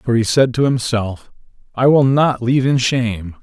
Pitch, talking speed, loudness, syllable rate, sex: 120 Hz, 195 wpm, -16 LUFS, 4.8 syllables/s, male